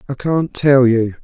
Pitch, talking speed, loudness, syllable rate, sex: 130 Hz, 195 wpm, -15 LUFS, 4.0 syllables/s, male